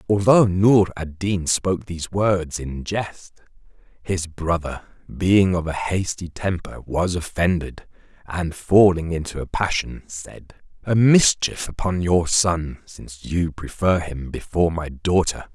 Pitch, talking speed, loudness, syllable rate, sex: 90 Hz, 140 wpm, -21 LUFS, 4.0 syllables/s, male